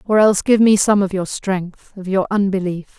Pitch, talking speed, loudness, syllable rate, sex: 195 Hz, 200 wpm, -17 LUFS, 5.0 syllables/s, female